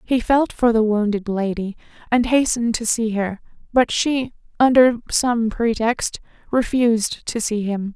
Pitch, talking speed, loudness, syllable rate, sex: 230 Hz, 150 wpm, -19 LUFS, 4.3 syllables/s, female